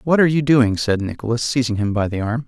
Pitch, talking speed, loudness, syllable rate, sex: 120 Hz, 265 wpm, -18 LUFS, 6.3 syllables/s, male